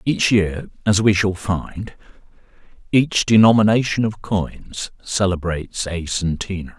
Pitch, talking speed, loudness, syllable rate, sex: 100 Hz, 115 wpm, -19 LUFS, 4.2 syllables/s, male